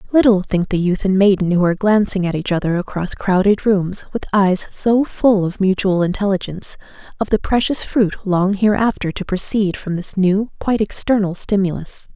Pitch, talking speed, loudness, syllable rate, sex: 195 Hz, 180 wpm, -17 LUFS, 5.1 syllables/s, female